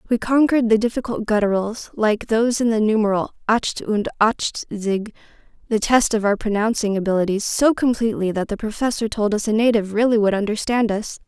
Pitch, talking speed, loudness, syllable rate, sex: 220 Hz, 170 wpm, -20 LUFS, 4.9 syllables/s, female